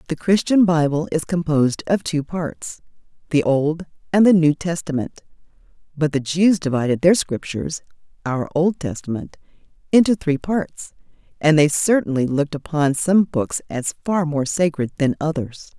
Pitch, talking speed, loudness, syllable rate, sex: 160 Hz, 140 wpm, -19 LUFS, 4.8 syllables/s, female